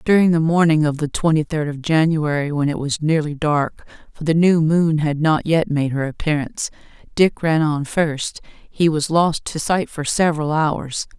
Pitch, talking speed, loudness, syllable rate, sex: 155 Hz, 195 wpm, -19 LUFS, 4.6 syllables/s, female